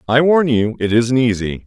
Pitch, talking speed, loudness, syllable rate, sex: 125 Hz, 215 wpm, -15 LUFS, 4.7 syllables/s, male